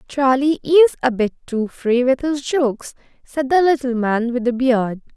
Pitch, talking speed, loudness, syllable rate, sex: 260 Hz, 185 wpm, -18 LUFS, 4.6 syllables/s, female